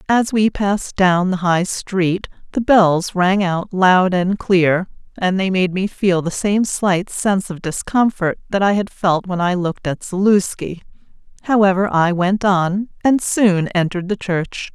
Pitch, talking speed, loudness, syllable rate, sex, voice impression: 190 Hz, 175 wpm, -17 LUFS, 4.1 syllables/s, female, feminine, adult-like, slightly clear, slightly intellectual, slightly calm